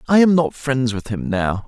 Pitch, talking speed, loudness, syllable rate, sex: 130 Hz, 250 wpm, -19 LUFS, 4.6 syllables/s, male